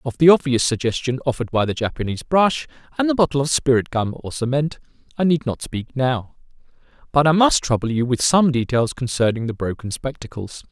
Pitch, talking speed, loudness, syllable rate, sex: 135 Hz, 190 wpm, -20 LUFS, 5.7 syllables/s, male